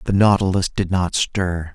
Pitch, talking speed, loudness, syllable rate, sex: 95 Hz, 170 wpm, -19 LUFS, 4.4 syllables/s, male